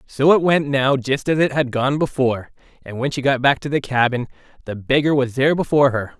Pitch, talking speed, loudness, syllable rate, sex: 135 Hz, 230 wpm, -18 LUFS, 5.8 syllables/s, male